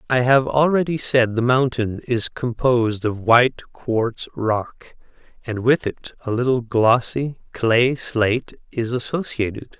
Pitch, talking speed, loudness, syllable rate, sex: 120 Hz, 135 wpm, -20 LUFS, 4.0 syllables/s, male